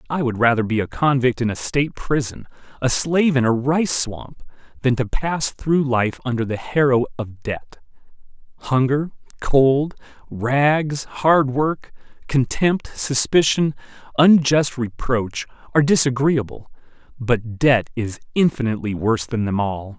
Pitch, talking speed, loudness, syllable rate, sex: 130 Hz, 135 wpm, -20 LUFS, 4.3 syllables/s, male